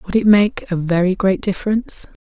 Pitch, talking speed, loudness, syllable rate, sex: 195 Hz, 190 wpm, -17 LUFS, 5.3 syllables/s, female